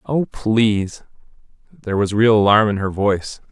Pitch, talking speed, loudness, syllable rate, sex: 105 Hz, 155 wpm, -17 LUFS, 4.9 syllables/s, male